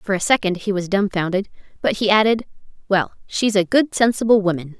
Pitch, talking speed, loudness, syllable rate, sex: 200 Hz, 190 wpm, -19 LUFS, 5.7 syllables/s, female